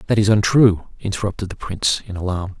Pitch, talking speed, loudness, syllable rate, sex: 100 Hz, 185 wpm, -19 LUFS, 6.2 syllables/s, male